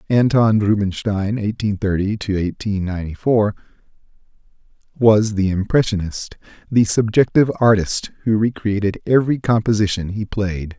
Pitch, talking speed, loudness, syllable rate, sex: 105 Hz, 115 wpm, -18 LUFS, 4.0 syllables/s, male